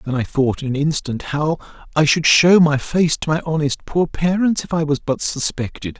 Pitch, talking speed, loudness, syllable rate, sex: 150 Hz, 220 wpm, -18 LUFS, 5.0 syllables/s, male